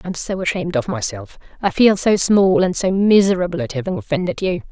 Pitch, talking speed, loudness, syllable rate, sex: 185 Hz, 205 wpm, -17 LUFS, 6.0 syllables/s, female